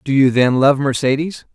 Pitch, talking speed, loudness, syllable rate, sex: 135 Hz, 195 wpm, -15 LUFS, 5.0 syllables/s, male